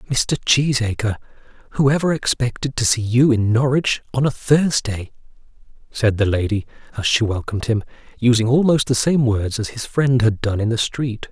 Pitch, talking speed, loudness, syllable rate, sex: 120 Hz, 170 wpm, -19 LUFS, 4.8 syllables/s, male